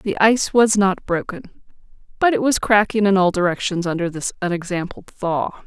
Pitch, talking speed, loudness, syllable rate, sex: 195 Hz, 170 wpm, -19 LUFS, 5.0 syllables/s, female